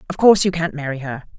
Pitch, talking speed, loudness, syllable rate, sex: 160 Hz, 260 wpm, -18 LUFS, 7.3 syllables/s, female